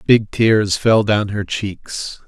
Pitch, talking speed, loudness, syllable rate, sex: 105 Hz, 160 wpm, -17 LUFS, 2.9 syllables/s, male